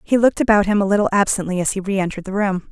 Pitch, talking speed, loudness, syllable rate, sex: 200 Hz, 265 wpm, -18 LUFS, 7.8 syllables/s, female